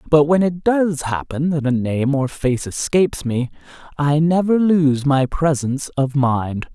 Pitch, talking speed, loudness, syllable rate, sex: 145 Hz, 170 wpm, -18 LUFS, 4.2 syllables/s, male